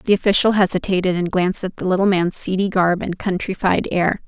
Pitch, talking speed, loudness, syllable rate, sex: 185 Hz, 195 wpm, -19 LUFS, 5.8 syllables/s, female